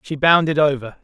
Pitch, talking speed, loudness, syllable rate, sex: 145 Hz, 175 wpm, -16 LUFS, 5.5 syllables/s, male